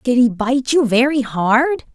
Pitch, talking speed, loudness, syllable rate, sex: 250 Hz, 185 wpm, -16 LUFS, 3.9 syllables/s, female